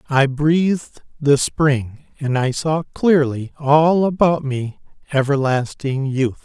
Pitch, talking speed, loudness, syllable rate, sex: 140 Hz, 120 wpm, -18 LUFS, 3.5 syllables/s, male